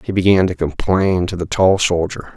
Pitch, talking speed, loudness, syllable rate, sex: 90 Hz, 205 wpm, -16 LUFS, 4.9 syllables/s, male